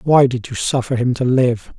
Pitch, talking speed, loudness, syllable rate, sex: 125 Hz, 235 wpm, -17 LUFS, 4.8 syllables/s, male